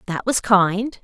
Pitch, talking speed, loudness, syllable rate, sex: 205 Hz, 175 wpm, -18 LUFS, 3.5 syllables/s, female